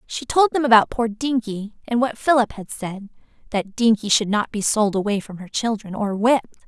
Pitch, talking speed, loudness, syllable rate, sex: 225 Hz, 205 wpm, -21 LUFS, 5.2 syllables/s, female